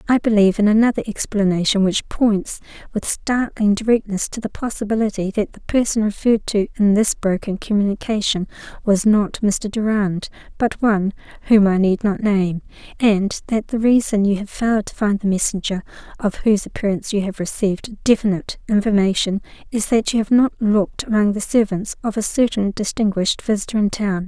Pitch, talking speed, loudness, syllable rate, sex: 210 Hz, 170 wpm, -19 LUFS, 5.5 syllables/s, female